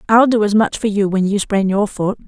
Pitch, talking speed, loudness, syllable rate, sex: 205 Hz, 290 wpm, -16 LUFS, 5.5 syllables/s, female